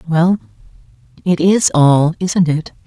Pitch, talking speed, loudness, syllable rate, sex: 160 Hz, 125 wpm, -14 LUFS, 3.6 syllables/s, female